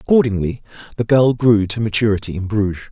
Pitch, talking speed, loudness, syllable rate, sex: 110 Hz, 165 wpm, -17 LUFS, 6.1 syllables/s, male